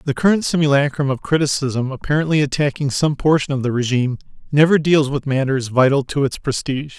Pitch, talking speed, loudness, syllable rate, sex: 140 Hz, 170 wpm, -18 LUFS, 6.0 syllables/s, male